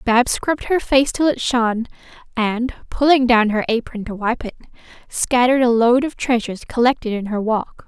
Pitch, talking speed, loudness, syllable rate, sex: 240 Hz, 185 wpm, -18 LUFS, 5.2 syllables/s, female